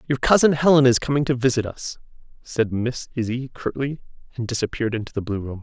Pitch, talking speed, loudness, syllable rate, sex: 125 Hz, 190 wpm, -21 LUFS, 6.1 syllables/s, male